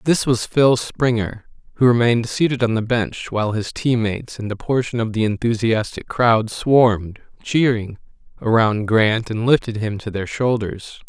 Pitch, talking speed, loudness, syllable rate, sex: 115 Hz, 170 wpm, -19 LUFS, 4.6 syllables/s, male